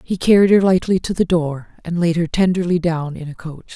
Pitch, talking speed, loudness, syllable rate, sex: 170 Hz, 240 wpm, -17 LUFS, 5.3 syllables/s, female